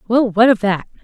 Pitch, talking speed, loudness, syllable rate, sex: 220 Hz, 230 wpm, -15 LUFS, 5.5 syllables/s, female